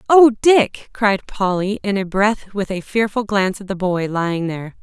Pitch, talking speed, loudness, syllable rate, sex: 200 Hz, 200 wpm, -18 LUFS, 4.6 syllables/s, female